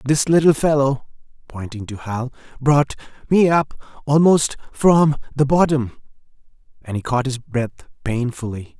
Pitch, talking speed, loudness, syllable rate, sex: 135 Hz, 90 wpm, -19 LUFS, 4.6 syllables/s, male